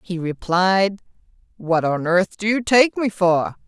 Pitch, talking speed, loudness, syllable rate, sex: 190 Hz, 165 wpm, -19 LUFS, 3.7 syllables/s, female